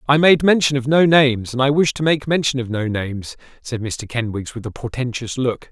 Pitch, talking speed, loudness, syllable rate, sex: 130 Hz, 230 wpm, -18 LUFS, 5.4 syllables/s, male